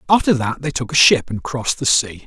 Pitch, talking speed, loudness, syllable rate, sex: 135 Hz, 265 wpm, -17 LUFS, 5.8 syllables/s, male